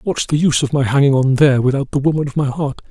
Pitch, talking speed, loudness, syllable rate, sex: 140 Hz, 290 wpm, -16 LUFS, 6.9 syllables/s, male